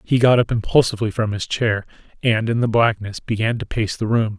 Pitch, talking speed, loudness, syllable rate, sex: 110 Hz, 220 wpm, -19 LUFS, 5.6 syllables/s, male